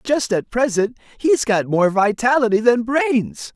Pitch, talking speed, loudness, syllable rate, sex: 225 Hz, 150 wpm, -18 LUFS, 4.0 syllables/s, male